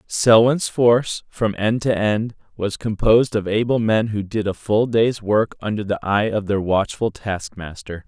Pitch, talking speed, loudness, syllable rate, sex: 105 Hz, 180 wpm, -19 LUFS, 4.4 syllables/s, male